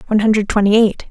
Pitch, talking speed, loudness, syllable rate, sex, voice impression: 210 Hz, 215 wpm, -14 LUFS, 7.7 syllables/s, female, very feminine, slightly young, slightly adult-like, very thin, tensed, powerful, bright, hard, clear, very fluent, slightly raspy, cool, intellectual, very refreshing, sincere, slightly calm, friendly, reassuring, very unique, elegant, wild, sweet, lively, strict, intense, sharp